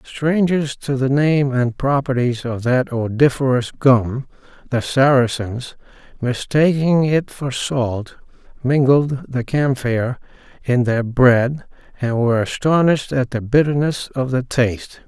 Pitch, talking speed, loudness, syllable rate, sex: 130 Hz, 125 wpm, -18 LUFS, 4.1 syllables/s, male